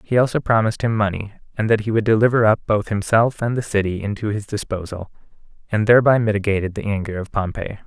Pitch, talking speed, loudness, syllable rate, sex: 105 Hz, 200 wpm, -19 LUFS, 6.5 syllables/s, male